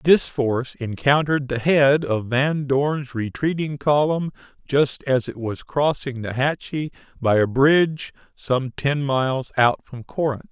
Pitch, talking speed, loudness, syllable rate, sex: 135 Hz, 150 wpm, -21 LUFS, 4.0 syllables/s, male